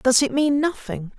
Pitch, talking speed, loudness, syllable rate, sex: 260 Hz, 200 wpm, -21 LUFS, 4.5 syllables/s, female